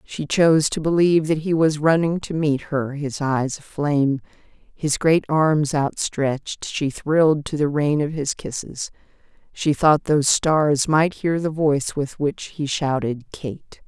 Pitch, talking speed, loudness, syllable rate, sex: 150 Hz, 170 wpm, -21 LUFS, 4.1 syllables/s, female